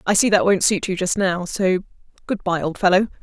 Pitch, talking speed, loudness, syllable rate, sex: 190 Hz, 240 wpm, -19 LUFS, 5.6 syllables/s, female